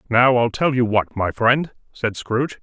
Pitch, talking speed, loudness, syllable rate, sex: 120 Hz, 205 wpm, -19 LUFS, 4.5 syllables/s, male